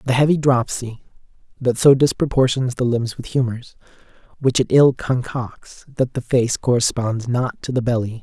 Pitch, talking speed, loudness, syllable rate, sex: 125 Hz, 160 wpm, -19 LUFS, 4.7 syllables/s, male